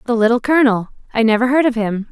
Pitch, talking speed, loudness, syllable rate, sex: 235 Hz, 225 wpm, -16 LUFS, 7.1 syllables/s, female